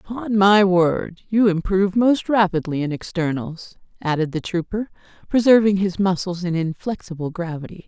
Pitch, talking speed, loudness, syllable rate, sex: 185 Hz, 135 wpm, -20 LUFS, 4.9 syllables/s, female